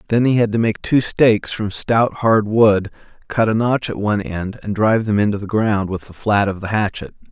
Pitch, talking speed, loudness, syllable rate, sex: 105 Hz, 240 wpm, -18 LUFS, 5.2 syllables/s, male